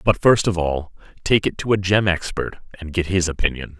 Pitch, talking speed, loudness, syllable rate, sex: 90 Hz, 220 wpm, -20 LUFS, 5.3 syllables/s, male